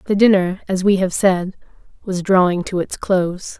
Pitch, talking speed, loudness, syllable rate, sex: 185 Hz, 185 wpm, -17 LUFS, 4.9 syllables/s, female